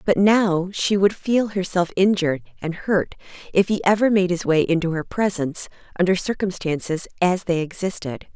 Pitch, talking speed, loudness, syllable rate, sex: 185 Hz, 165 wpm, -21 LUFS, 5.1 syllables/s, female